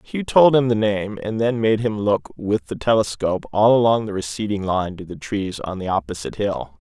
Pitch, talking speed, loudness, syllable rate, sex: 105 Hz, 220 wpm, -20 LUFS, 5.2 syllables/s, male